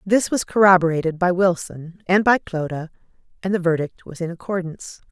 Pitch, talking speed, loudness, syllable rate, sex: 180 Hz, 165 wpm, -20 LUFS, 5.5 syllables/s, female